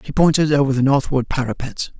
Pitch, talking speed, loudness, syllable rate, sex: 140 Hz, 180 wpm, -18 LUFS, 6.0 syllables/s, male